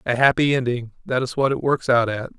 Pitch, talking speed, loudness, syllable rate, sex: 125 Hz, 250 wpm, -20 LUFS, 5.8 syllables/s, male